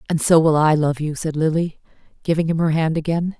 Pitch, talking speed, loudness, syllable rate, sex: 160 Hz, 230 wpm, -19 LUFS, 5.4 syllables/s, female